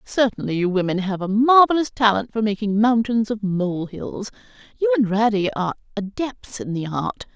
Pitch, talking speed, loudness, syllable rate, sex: 215 Hz, 155 wpm, -21 LUFS, 5.2 syllables/s, female